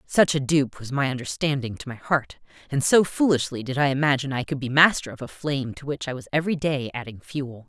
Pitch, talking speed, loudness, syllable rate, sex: 140 Hz, 235 wpm, -24 LUFS, 6.0 syllables/s, female